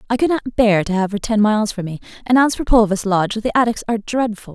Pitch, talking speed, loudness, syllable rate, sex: 220 Hz, 265 wpm, -17 LUFS, 6.7 syllables/s, female